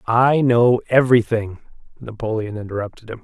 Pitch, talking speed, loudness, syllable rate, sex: 115 Hz, 110 wpm, -18 LUFS, 5.3 syllables/s, male